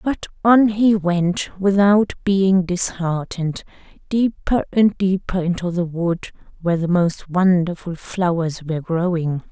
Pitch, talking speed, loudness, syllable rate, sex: 180 Hz, 125 wpm, -19 LUFS, 4.1 syllables/s, female